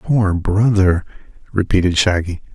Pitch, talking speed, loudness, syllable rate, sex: 95 Hz, 95 wpm, -16 LUFS, 4.3 syllables/s, male